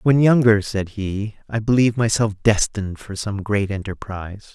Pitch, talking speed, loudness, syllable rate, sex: 105 Hz, 160 wpm, -20 LUFS, 4.9 syllables/s, male